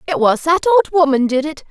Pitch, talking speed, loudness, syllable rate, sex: 300 Hz, 245 wpm, -15 LUFS, 6.4 syllables/s, female